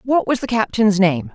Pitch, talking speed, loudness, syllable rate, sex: 220 Hz, 225 wpm, -17 LUFS, 4.8 syllables/s, female